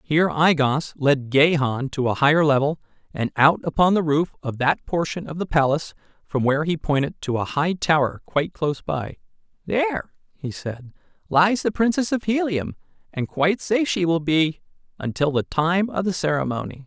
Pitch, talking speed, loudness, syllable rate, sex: 160 Hz, 180 wpm, -22 LUFS, 5.2 syllables/s, male